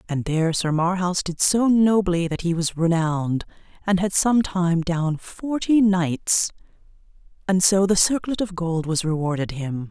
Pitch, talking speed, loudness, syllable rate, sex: 180 Hz, 155 wpm, -21 LUFS, 4.6 syllables/s, female